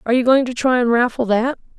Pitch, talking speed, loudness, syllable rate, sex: 245 Hz, 270 wpm, -17 LUFS, 6.7 syllables/s, female